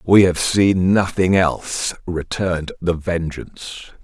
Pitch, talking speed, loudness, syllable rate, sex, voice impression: 90 Hz, 120 wpm, -18 LUFS, 4.0 syllables/s, male, masculine, middle-aged, tensed, powerful, clear, intellectual, calm, mature, friendly, wild, strict